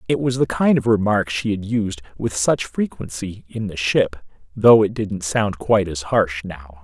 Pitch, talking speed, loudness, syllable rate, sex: 105 Hz, 200 wpm, -20 LUFS, 4.4 syllables/s, male